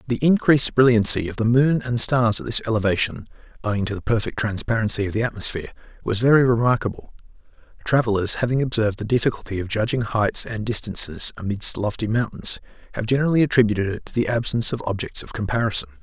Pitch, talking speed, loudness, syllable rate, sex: 115 Hz, 170 wpm, -21 LUFS, 6.5 syllables/s, male